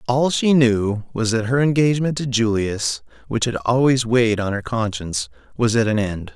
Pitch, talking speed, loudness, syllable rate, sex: 120 Hz, 190 wpm, -19 LUFS, 5.0 syllables/s, male